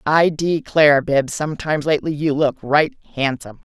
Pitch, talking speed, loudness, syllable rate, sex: 150 Hz, 145 wpm, -18 LUFS, 5.4 syllables/s, female